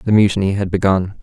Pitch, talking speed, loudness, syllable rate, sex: 100 Hz, 195 wpm, -16 LUFS, 5.9 syllables/s, male